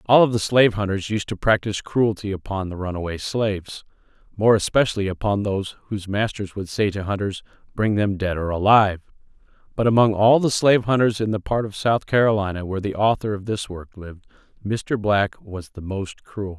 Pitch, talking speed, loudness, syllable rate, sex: 105 Hz, 190 wpm, -21 LUFS, 5.6 syllables/s, male